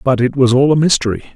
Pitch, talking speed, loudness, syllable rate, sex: 130 Hz, 265 wpm, -13 LUFS, 7.0 syllables/s, male